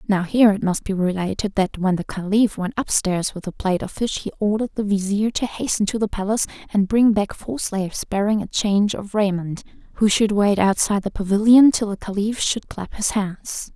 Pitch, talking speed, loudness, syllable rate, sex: 205 Hz, 215 wpm, -20 LUFS, 5.5 syllables/s, female